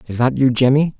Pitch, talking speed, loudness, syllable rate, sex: 130 Hz, 240 wpm, -16 LUFS, 5.9 syllables/s, male